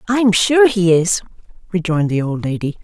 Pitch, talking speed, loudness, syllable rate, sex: 185 Hz, 170 wpm, -16 LUFS, 5.2 syllables/s, female